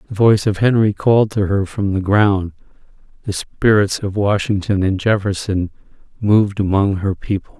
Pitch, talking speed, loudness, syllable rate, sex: 100 Hz, 160 wpm, -17 LUFS, 5.0 syllables/s, male